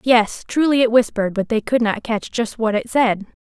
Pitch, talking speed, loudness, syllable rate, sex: 230 Hz, 225 wpm, -18 LUFS, 5.1 syllables/s, female